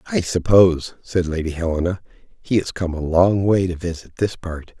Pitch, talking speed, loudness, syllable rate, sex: 90 Hz, 190 wpm, -20 LUFS, 5.0 syllables/s, male